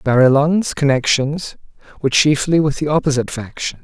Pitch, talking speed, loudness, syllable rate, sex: 145 Hz, 125 wpm, -16 LUFS, 5.4 syllables/s, male